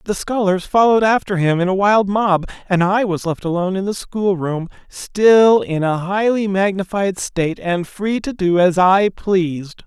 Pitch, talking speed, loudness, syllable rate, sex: 190 Hz, 190 wpm, -17 LUFS, 4.5 syllables/s, male